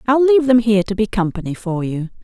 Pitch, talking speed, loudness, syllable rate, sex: 215 Hz, 240 wpm, -17 LUFS, 6.6 syllables/s, female